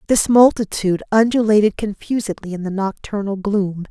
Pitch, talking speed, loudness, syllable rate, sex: 205 Hz, 125 wpm, -18 LUFS, 5.3 syllables/s, female